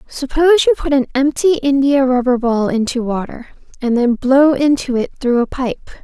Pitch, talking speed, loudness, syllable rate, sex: 260 Hz, 180 wpm, -15 LUFS, 4.9 syllables/s, female